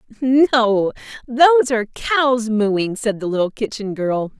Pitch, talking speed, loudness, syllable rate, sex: 235 Hz, 135 wpm, -18 LUFS, 4.6 syllables/s, female